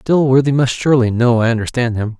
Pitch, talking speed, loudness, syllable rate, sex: 125 Hz, 190 wpm, -14 LUFS, 6.1 syllables/s, male